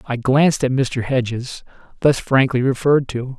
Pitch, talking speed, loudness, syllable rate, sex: 130 Hz, 160 wpm, -18 LUFS, 4.8 syllables/s, male